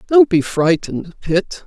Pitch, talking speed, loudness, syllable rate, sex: 190 Hz, 145 wpm, -17 LUFS, 4.1 syllables/s, female